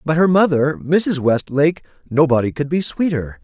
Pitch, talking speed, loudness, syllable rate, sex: 150 Hz, 140 wpm, -17 LUFS, 4.9 syllables/s, male